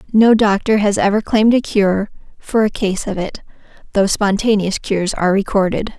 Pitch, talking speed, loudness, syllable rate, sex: 205 Hz, 170 wpm, -16 LUFS, 5.3 syllables/s, female